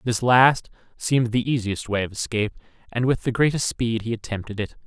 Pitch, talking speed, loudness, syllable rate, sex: 115 Hz, 195 wpm, -23 LUFS, 5.7 syllables/s, male